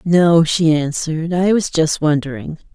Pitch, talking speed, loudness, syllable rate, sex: 160 Hz, 155 wpm, -16 LUFS, 4.4 syllables/s, female